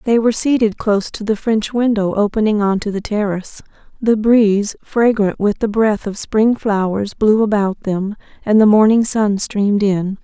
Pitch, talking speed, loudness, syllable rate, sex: 210 Hz, 180 wpm, -16 LUFS, 4.8 syllables/s, female